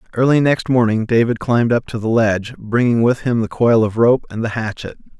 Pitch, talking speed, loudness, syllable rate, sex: 115 Hz, 220 wpm, -16 LUFS, 5.6 syllables/s, male